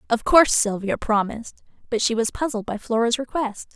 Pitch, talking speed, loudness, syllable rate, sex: 235 Hz, 175 wpm, -21 LUFS, 5.7 syllables/s, female